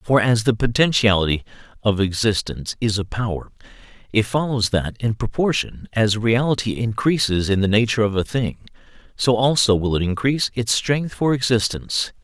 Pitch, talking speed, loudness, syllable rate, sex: 110 Hz, 155 wpm, -20 LUFS, 5.2 syllables/s, male